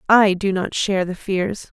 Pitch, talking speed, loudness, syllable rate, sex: 195 Hz, 200 wpm, -20 LUFS, 4.5 syllables/s, female